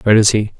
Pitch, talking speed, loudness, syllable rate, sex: 105 Hz, 300 wpm, -13 LUFS, 8.5 syllables/s, male